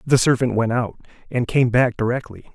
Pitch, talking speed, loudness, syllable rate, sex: 120 Hz, 190 wpm, -20 LUFS, 5.5 syllables/s, male